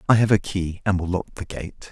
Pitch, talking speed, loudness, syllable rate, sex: 95 Hz, 280 wpm, -23 LUFS, 5.7 syllables/s, male